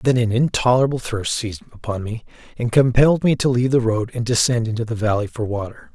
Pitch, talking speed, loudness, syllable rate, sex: 115 Hz, 210 wpm, -19 LUFS, 6.4 syllables/s, male